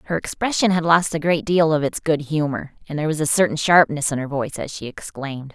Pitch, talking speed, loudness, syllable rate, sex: 155 Hz, 250 wpm, -20 LUFS, 6.1 syllables/s, female